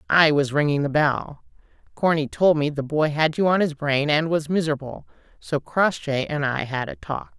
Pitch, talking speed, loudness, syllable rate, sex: 150 Hz, 205 wpm, -22 LUFS, 4.9 syllables/s, female